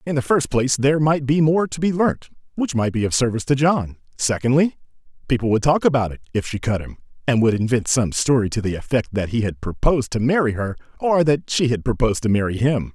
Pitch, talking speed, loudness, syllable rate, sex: 125 Hz, 235 wpm, -20 LUFS, 6.1 syllables/s, male